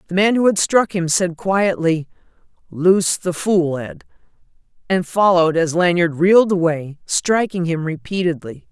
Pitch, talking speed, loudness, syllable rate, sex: 175 Hz, 145 wpm, -17 LUFS, 4.6 syllables/s, female